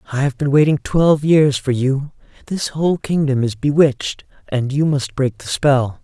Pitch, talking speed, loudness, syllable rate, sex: 140 Hz, 190 wpm, -17 LUFS, 4.8 syllables/s, male